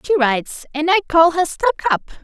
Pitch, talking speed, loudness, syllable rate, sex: 330 Hz, 215 wpm, -17 LUFS, 5.6 syllables/s, female